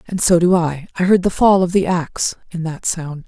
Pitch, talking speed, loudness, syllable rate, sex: 175 Hz, 255 wpm, -17 LUFS, 5.2 syllables/s, female